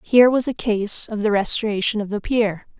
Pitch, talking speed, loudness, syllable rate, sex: 215 Hz, 215 wpm, -20 LUFS, 5.5 syllables/s, female